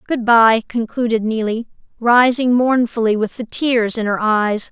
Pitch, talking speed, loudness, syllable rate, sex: 230 Hz, 155 wpm, -16 LUFS, 4.3 syllables/s, female